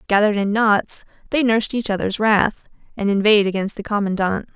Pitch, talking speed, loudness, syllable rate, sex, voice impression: 210 Hz, 170 wpm, -19 LUFS, 5.8 syllables/s, female, very feminine, very adult-like, slightly middle-aged, thin, very tensed, powerful, very bright, soft, very clear, very fluent, cool, intellectual, slightly refreshing, slightly sincere, calm, friendly, reassuring, elegant, lively, slightly strict